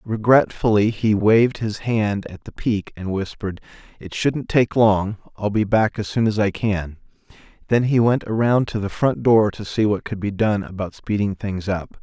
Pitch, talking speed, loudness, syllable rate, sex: 105 Hz, 195 wpm, -20 LUFS, 4.7 syllables/s, male